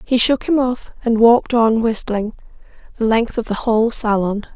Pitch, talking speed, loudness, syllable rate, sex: 225 Hz, 185 wpm, -17 LUFS, 5.0 syllables/s, female